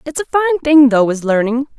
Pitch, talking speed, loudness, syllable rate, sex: 270 Hz, 235 wpm, -13 LUFS, 6.4 syllables/s, female